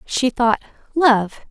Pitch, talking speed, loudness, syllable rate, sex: 250 Hz, 120 wpm, -18 LUFS, 3.0 syllables/s, female